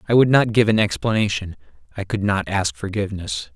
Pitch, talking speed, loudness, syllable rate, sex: 100 Hz, 185 wpm, -20 LUFS, 5.7 syllables/s, male